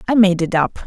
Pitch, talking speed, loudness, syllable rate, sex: 190 Hz, 275 wpm, -16 LUFS, 5.6 syllables/s, female